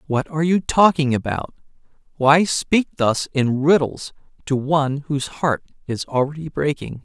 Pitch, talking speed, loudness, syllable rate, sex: 145 Hz, 135 wpm, -20 LUFS, 4.7 syllables/s, male